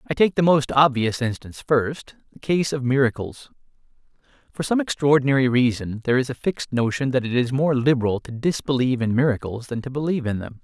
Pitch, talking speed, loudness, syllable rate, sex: 130 Hz, 190 wpm, -21 LUFS, 6.1 syllables/s, male